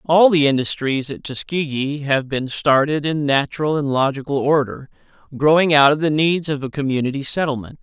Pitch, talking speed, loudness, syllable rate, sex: 145 Hz, 170 wpm, -18 LUFS, 5.2 syllables/s, male